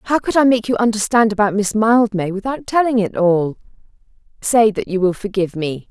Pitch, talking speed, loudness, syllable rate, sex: 210 Hz, 195 wpm, -17 LUFS, 5.4 syllables/s, female